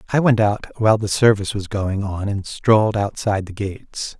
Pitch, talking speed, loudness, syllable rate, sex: 105 Hz, 200 wpm, -19 LUFS, 5.5 syllables/s, male